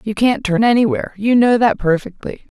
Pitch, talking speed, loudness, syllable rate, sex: 220 Hz, 185 wpm, -15 LUFS, 5.5 syllables/s, female